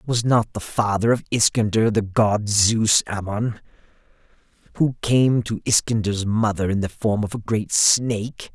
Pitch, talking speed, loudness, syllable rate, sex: 110 Hz, 155 wpm, -20 LUFS, 4.2 syllables/s, male